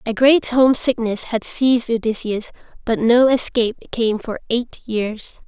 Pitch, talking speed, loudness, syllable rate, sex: 235 Hz, 140 wpm, -18 LUFS, 4.5 syllables/s, female